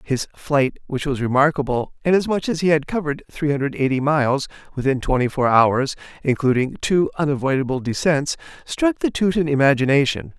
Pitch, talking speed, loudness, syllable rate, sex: 145 Hz, 150 wpm, -20 LUFS, 5.5 syllables/s, male